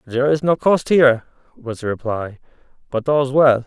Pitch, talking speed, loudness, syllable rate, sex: 130 Hz, 180 wpm, -18 LUFS, 5.2 syllables/s, male